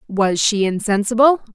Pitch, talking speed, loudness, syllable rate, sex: 220 Hz, 115 wpm, -17 LUFS, 4.5 syllables/s, female